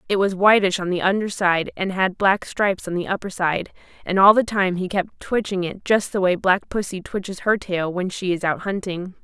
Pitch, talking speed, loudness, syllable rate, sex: 190 Hz, 235 wpm, -21 LUFS, 5.1 syllables/s, female